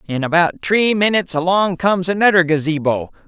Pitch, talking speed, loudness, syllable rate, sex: 175 Hz, 145 wpm, -16 LUFS, 5.9 syllables/s, male